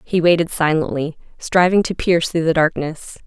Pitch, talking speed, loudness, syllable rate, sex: 165 Hz, 165 wpm, -18 LUFS, 5.2 syllables/s, female